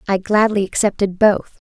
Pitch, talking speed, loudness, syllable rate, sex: 200 Hz, 145 wpm, -17 LUFS, 5.0 syllables/s, female